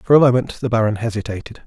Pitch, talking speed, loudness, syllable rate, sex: 115 Hz, 215 wpm, -18 LUFS, 7.1 syllables/s, male